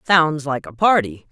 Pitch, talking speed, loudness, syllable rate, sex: 150 Hz, 185 wpm, -18 LUFS, 4.4 syllables/s, female